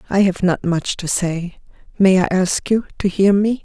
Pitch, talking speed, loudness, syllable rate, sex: 190 Hz, 215 wpm, -17 LUFS, 4.5 syllables/s, female